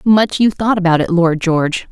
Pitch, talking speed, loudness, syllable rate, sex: 185 Hz, 220 wpm, -14 LUFS, 5.0 syllables/s, female